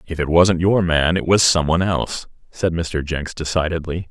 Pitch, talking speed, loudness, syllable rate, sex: 85 Hz, 205 wpm, -18 LUFS, 5.1 syllables/s, male